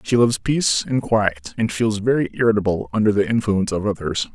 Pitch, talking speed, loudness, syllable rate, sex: 105 Hz, 195 wpm, -20 LUFS, 5.9 syllables/s, male